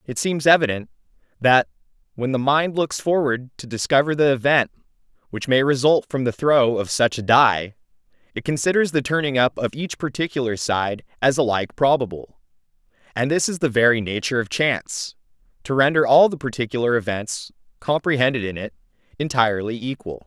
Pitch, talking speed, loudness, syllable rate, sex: 130 Hz, 160 wpm, -20 LUFS, 5.5 syllables/s, male